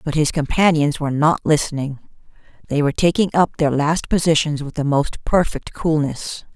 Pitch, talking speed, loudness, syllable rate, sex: 150 Hz, 165 wpm, -19 LUFS, 5.2 syllables/s, female